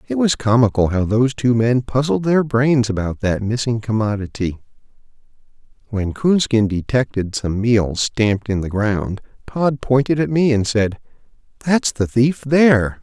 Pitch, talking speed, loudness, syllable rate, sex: 120 Hz, 150 wpm, -18 LUFS, 4.5 syllables/s, male